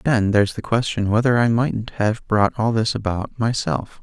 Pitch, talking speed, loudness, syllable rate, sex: 110 Hz, 210 wpm, -20 LUFS, 5.1 syllables/s, male